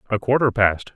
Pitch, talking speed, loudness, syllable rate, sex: 110 Hz, 190 wpm, -19 LUFS, 5.5 syllables/s, male